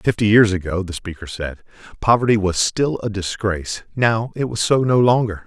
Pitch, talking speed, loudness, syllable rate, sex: 105 Hz, 185 wpm, -19 LUFS, 5.1 syllables/s, male